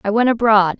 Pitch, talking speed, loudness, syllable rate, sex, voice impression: 215 Hz, 230 wpm, -15 LUFS, 5.8 syllables/s, female, feminine, adult-like, tensed, bright, clear, slightly nasal, calm, friendly, reassuring, unique, slightly lively, kind